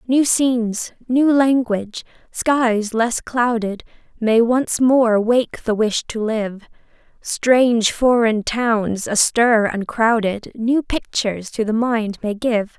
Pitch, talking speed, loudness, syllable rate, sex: 230 Hz, 130 wpm, -18 LUFS, 3.4 syllables/s, female